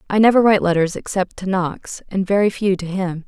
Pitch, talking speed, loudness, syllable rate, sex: 190 Hz, 220 wpm, -18 LUFS, 5.6 syllables/s, female